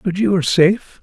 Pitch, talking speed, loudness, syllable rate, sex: 185 Hz, 175 wpm, -15 LUFS, 6.5 syllables/s, male